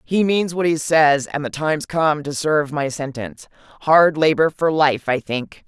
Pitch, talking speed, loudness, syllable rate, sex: 150 Hz, 200 wpm, -18 LUFS, 4.6 syllables/s, female